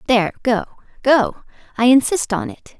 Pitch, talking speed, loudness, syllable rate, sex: 245 Hz, 130 wpm, -17 LUFS, 5.1 syllables/s, female